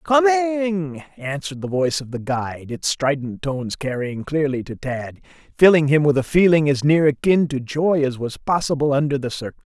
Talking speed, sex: 185 wpm, male